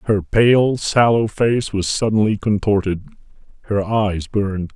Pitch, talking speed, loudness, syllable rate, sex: 105 Hz, 125 wpm, -18 LUFS, 4.0 syllables/s, male